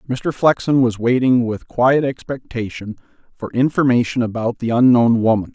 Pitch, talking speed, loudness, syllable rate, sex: 120 Hz, 140 wpm, -17 LUFS, 4.8 syllables/s, male